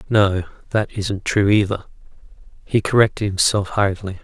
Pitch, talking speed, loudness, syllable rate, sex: 100 Hz, 130 wpm, -19 LUFS, 5.0 syllables/s, male